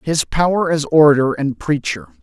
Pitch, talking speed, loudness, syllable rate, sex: 155 Hz, 160 wpm, -16 LUFS, 5.0 syllables/s, male